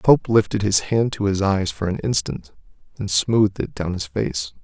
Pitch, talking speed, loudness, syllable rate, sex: 100 Hz, 220 wpm, -21 LUFS, 4.9 syllables/s, male